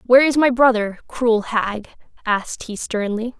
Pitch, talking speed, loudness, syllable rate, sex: 230 Hz, 160 wpm, -19 LUFS, 4.6 syllables/s, female